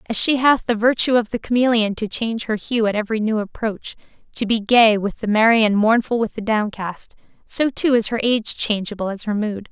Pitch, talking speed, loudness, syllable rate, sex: 220 Hz, 220 wpm, -19 LUFS, 5.5 syllables/s, female